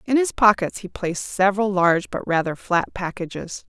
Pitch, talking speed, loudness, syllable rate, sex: 190 Hz, 175 wpm, -21 LUFS, 5.4 syllables/s, female